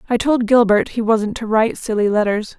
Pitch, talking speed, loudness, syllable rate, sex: 225 Hz, 210 wpm, -17 LUFS, 5.4 syllables/s, female